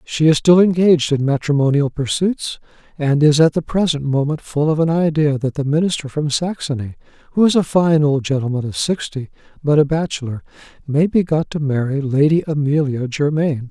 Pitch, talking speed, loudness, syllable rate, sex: 150 Hz, 180 wpm, -17 LUFS, 5.3 syllables/s, male